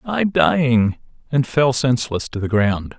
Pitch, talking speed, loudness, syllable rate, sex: 125 Hz, 160 wpm, -18 LUFS, 4.3 syllables/s, male